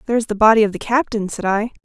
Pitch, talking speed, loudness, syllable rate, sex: 215 Hz, 295 wpm, -17 LUFS, 7.6 syllables/s, female